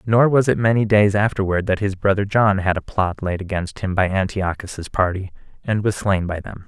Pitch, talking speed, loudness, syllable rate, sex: 100 Hz, 215 wpm, -20 LUFS, 5.1 syllables/s, male